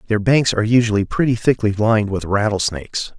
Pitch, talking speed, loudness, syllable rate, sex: 110 Hz, 170 wpm, -17 LUFS, 6.1 syllables/s, male